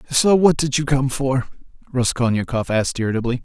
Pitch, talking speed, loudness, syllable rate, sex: 130 Hz, 175 wpm, -19 LUFS, 6.1 syllables/s, male